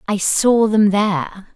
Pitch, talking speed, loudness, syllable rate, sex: 205 Hz, 155 wpm, -16 LUFS, 4.3 syllables/s, female